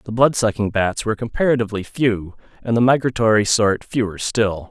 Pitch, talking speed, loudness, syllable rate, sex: 110 Hz, 165 wpm, -19 LUFS, 5.6 syllables/s, male